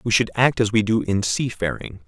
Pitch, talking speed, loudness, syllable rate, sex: 105 Hz, 230 wpm, -21 LUFS, 5.2 syllables/s, male